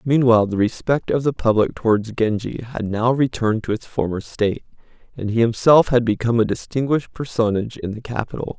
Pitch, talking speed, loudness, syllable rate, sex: 115 Hz, 180 wpm, -20 LUFS, 5.9 syllables/s, male